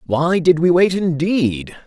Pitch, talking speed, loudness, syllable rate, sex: 165 Hz, 160 wpm, -16 LUFS, 3.7 syllables/s, male